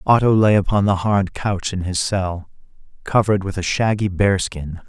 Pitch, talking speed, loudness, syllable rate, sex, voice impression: 95 Hz, 185 wpm, -19 LUFS, 4.8 syllables/s, male, masculine, adult-like, slightly cool, slightly intellectual, slightly calm, slightly friendly